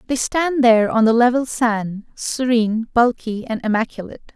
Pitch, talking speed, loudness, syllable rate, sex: 235 Hz, 150 wpm, -18 LUFS, 5.1 syllables/s, female